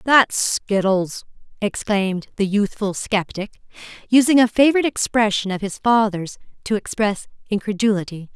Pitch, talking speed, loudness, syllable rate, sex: 210 Hz, 115 wpm, -19 LUFS, 4.9 syllables/s, female